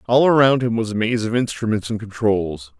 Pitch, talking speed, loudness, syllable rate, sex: 110 Hz, 215 wpm, -19 LUFS, 5.3 syllables/s, male